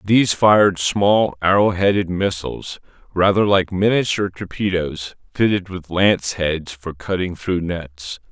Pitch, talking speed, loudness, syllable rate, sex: 90 Hz, 130 wpm, -18 LUFS, 4.4 syllables/s, male